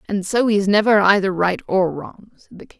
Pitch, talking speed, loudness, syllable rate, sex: 195 Hz, 260 wpm, -17 LUFS, 5.3 syllables/s, female